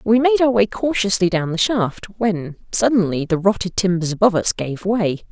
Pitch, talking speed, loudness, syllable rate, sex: 200 Hz, 190 wpm, -18 LUFS, 5.0 syllables/s, female